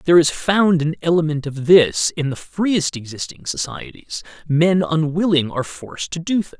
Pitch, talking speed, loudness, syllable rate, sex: 150 Hz, 175 wpm, -19 LUFS, 4.9 syllables/s, male